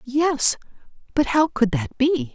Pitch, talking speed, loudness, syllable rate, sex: 250 Hz, 155 wpm, -21 LUFS, 3.6 syllables/s, female